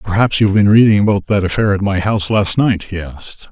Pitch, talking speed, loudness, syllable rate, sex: 100 Hz, 240 wpm, -13 LUFS, 6.2 syllables/s, male